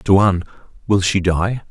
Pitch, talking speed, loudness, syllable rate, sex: 95 Hz, 140 wpm, -17 LUFS, 4.2 syllables/s, male